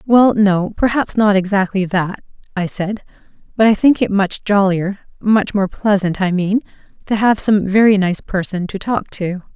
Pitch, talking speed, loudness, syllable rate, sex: 200 Hz, 165 wpm, -16 LUFS, 4.5 syllables/s, female